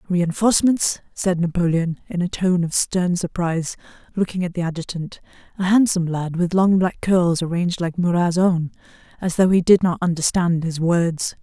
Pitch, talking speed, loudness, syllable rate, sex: 175 Hz, 160 wpm, -20 LUFS, 5.0 syllables/s, female